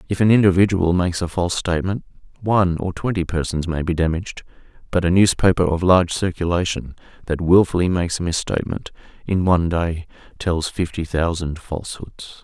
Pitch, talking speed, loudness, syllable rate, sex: 90 Hz, 155 wpm, -20 LUFS, 6.0 syllables/s, male